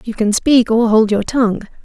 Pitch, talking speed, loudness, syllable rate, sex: 225 Hz, 230 wpm, -14 LUFS, 5.0 syllables/s, female